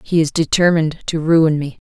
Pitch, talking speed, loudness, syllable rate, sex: 160 Hz, 195 wpm, -16 LUFS, 5.5 syllables/s, female